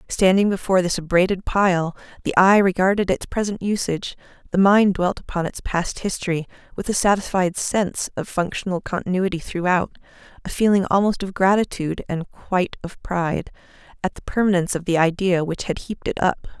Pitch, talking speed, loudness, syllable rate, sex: 185 Hz, 165 wpm, -21 LUFS, 5.6 syllables/s, female